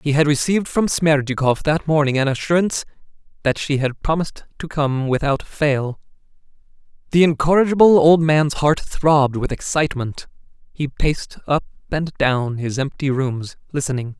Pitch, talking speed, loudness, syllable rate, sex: 145 Hz, 145 wpm, -19 LUFS, 5.1 syllables/s, male